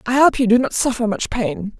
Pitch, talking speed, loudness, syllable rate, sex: 235 Hz, 270 wpm, -18 LUFS, 5.4 syllables/s, female